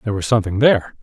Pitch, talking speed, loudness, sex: 110 Hz, 235 wpm, -17 LUFS, male